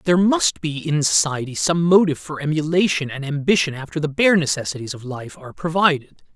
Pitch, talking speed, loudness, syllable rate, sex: 155 Hz, 180 wpm, -19 LUFS, 5.9 syllables/s, male